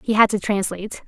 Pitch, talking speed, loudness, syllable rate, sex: 205 Hz, 225 wpm, -20 LUFS, 6.4 syllables/s, female